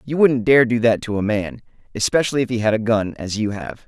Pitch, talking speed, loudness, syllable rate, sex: 115 Hz, 265 wpm, -19 LUFS, 5.8 syllables/s, male